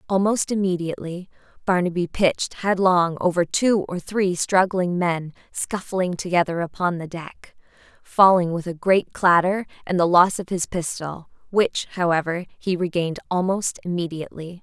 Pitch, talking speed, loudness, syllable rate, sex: 180 Hz, 135 wpm, -22 LUFS, 4.7 syllables/s, female